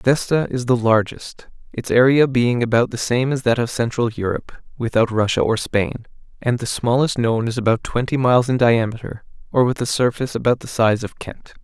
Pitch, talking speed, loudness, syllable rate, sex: 120 Hz, 185 wpm, -19 LUFS, 5.4 syllables/s, male